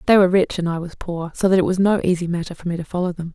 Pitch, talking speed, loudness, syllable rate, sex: 180 Hz, 340 wpm, -20 LUFS, 7.4 syllables/s, female